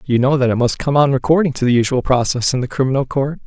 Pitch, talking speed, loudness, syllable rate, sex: 135 Hz, 275 wpm, -16 LUFS, 6.6 syllables/s, male